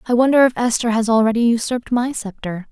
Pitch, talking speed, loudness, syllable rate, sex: 235 Hz, 200 wpm, -17 LUFS, 6.3 syllables/s, female